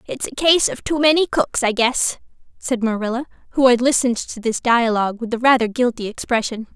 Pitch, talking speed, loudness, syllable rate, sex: 240 Hz, 195 wpm, -18 LUFS, 5.7 syllables/s, female